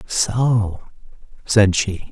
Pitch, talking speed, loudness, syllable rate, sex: 105 Hz, 85 wpm, -18 LUFS, 2.2 syllables/s, male